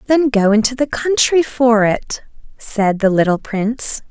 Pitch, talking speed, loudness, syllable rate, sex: 235 Hz, 160 wpm, -15 LUFS, 4.2 syllables/s, female